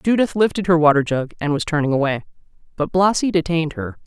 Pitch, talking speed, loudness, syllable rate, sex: 160 Hz, 190 wpm, -19 LUFS, 6.3 syllables/s, female